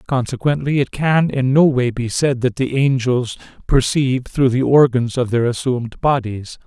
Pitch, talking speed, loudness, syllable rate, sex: 130 Hz, 170 wpm, -17 LUFS, 4.7 syllables/s, male